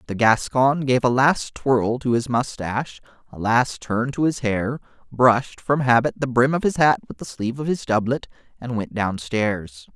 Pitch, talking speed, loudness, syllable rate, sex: 120 Hz, 195 wpm, -21 LUFS, 4.6 syllables/s, male